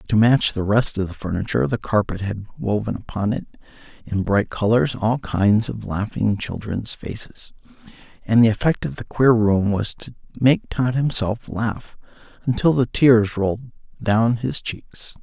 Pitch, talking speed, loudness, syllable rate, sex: 110 Hz, 165 wpm, -21 LUFS, 4.4 syllables/s, male